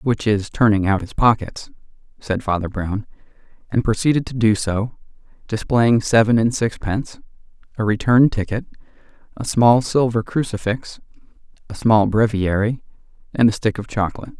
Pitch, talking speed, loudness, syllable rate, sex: 110 Hz, 140 wpm, -19 LUFS, 5.1 syllables/s, male